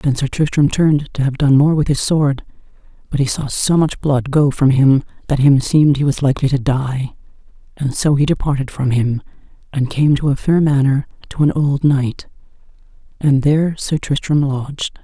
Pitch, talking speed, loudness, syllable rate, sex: 140 Hz, 195 wpm, -16 LUFS, 5.1 syllables/s, female